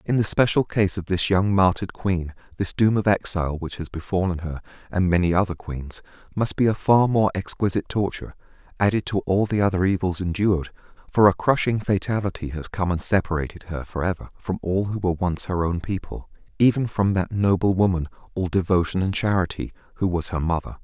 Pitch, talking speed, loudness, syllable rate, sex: 95 Hz, 195 wpm, -23 LUFS, 5.8 syllables/s, male